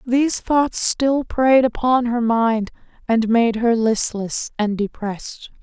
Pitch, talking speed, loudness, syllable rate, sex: 235 Hz, 140 wpm, -18 LUFS, 3.6 syllables/s, female